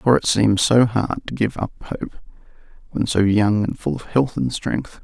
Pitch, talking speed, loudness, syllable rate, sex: 115 Hz, 215 wpm, -20 LUFS, 4.5 syllables/s, male